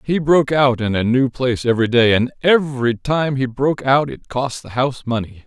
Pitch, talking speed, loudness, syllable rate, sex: 130 Hz, 220 wpm, -17 LUFS, 5.5 syllables/s, male